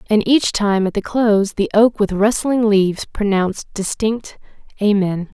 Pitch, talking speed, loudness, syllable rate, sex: 210 Hz, 155 wpm, -17 LUFS, 4.5 syllables/s, female